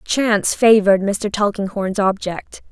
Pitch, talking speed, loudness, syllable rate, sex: 205 Hz, 110 wpm, -17 LUFS, 4.3 syllables/s, female